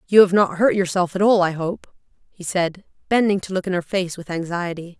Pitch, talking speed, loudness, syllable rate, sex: 185 Hz, 230 wpm, -20 LUFS, 5.5 syllables/s, female